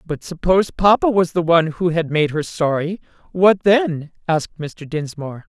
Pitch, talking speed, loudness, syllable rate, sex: 170 Hz, 175 wpm, -18 LUFS, 4.9 syllables/s, female